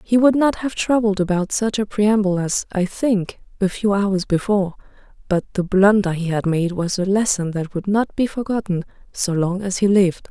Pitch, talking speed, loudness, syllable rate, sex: 195 Hz, 205 wpm, -19 LUFS, 5.0 syllables/s, female